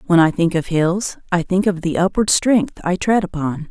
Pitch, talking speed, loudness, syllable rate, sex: 180 Hz, 225 wpm, -18 LUFS, 4.7 syllables/s, female